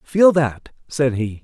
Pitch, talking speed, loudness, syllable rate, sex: 135 Hz, 165 wpm, -18 LUFS, 3.4 syllables/s, male